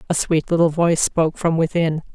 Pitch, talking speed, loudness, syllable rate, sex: 165 Hz, 195 wpm, -19 LUFS, 6.0 syllables/s, female